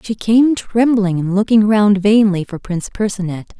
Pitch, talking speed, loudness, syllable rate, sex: 205 Hz, 165 wpm, -15 LUFS, 4.7 syllables/s, female